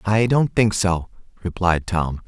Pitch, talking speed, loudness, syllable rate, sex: 95 Hz, 160 wpm, -20 LUFS, 3.9 syllables/s, male